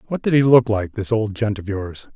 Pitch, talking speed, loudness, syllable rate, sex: 110 Hz, 250 wpm, -19 LUFS, 5.2 syllables/s, male